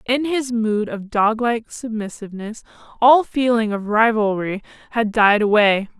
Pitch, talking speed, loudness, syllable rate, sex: 220 Hz, 130 wpm, -18 LUFS, 4.5 syllables/s, female